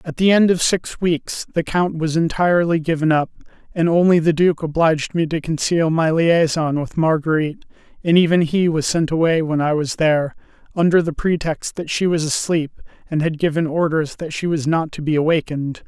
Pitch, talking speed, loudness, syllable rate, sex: 160 Hz, 195 wpm, -18 LUFS, 5.3 syllables/s, male